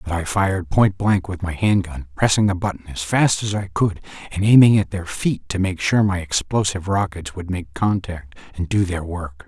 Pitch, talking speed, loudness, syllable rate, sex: 90 Hz, 215 wpm, -20 LUFS, 5.1 syllables/s, male